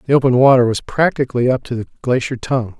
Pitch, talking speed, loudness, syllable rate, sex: 125 Hz, 215 wpm, -16 LUFS, 6.9 syllables/s, male